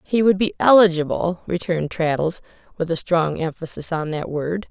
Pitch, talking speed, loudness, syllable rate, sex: 170 Hz, 165 wpm, -20 LUFS, 5.0 syllables/s, female